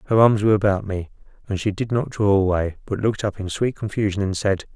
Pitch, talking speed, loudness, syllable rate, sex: 105 Hz, 240 wpm, -21 LUFS, 6.3 syllables/s, male